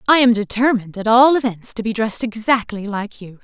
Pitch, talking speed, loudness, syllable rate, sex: 225 Hz, 210 wpm, -17 LUFS, 5.9 syllables/s, female